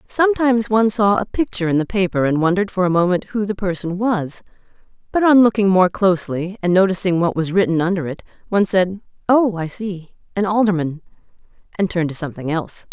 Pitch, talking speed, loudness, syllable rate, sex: 190 Hz, 190 wpm, -18 LUFS, 6.3 syllables/s, female